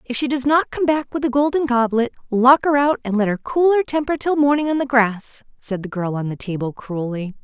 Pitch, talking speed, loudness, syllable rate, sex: 255 Hz, 250 wpm, -19 LUFS, 5.4 syllables/s, female